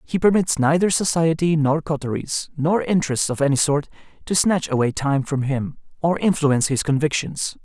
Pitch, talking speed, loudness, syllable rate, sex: 150 Hz, 165 wpm, -20 LUFS, 5.1 syllables/s, male